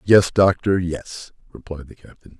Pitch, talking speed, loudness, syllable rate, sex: 90 Hz, 150 wpm, -18 LUFS, 4.3 syllables/s, male